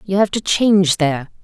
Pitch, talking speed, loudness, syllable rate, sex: 185 Hz, 210 wpm, -16 LUFS, 5.7 syllables/s, female